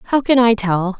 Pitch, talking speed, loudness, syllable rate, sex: 220 Hz, 240 wpm, -15 LUFS, 4.2 syllables/s, female